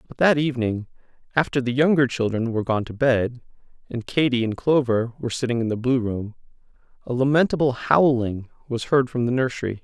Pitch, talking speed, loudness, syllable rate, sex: 125 Hz, 175 wpm, -22 LUFS, 5.8 syllables/s, male